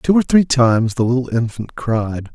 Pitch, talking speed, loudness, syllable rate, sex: 125 Hz, 205 wpm, -17 LUFS, 4.8 syllables/s, male